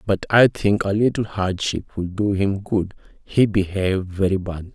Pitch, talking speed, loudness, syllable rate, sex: 100 Hz, 175 wpm, -21 LUFS, 4.8 syllables/s, male